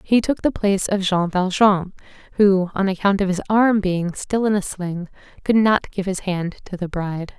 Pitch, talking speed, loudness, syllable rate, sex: 190 Hz, 210 wpm, -20 LUFS, 4.8 syllables/s, female